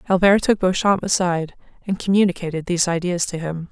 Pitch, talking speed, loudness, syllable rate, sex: 180 Hz, 160 wpm, -19 LUFS, 6.1 syllables/s, female